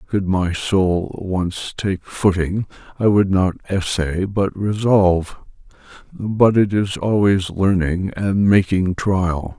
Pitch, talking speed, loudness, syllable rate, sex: 95 Hz, 125 wpm, -18 LUFS, 3.3 syllables/s, male